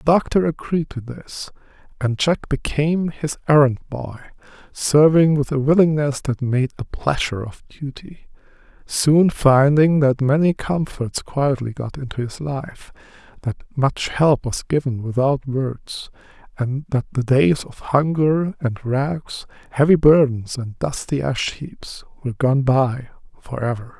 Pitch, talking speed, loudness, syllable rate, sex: 140 Hz, 145 wpm, -19 LUFS, 4.1 syllables/s, male